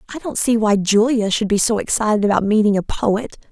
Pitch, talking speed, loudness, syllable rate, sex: 215 Hz, 220 wpm, -17 LUFS, 5.8 syllables/s, female